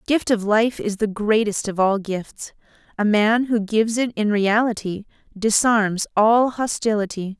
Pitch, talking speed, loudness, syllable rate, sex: 215 Hz, 155 wpm, -20 LUFS, 4.2 syllables/s, female